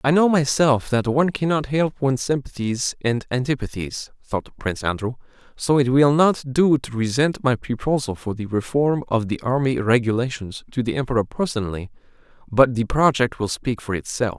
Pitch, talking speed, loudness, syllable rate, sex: 125 Hz, 170 wpm, -21 LUFS, 5.2 syllables/s, male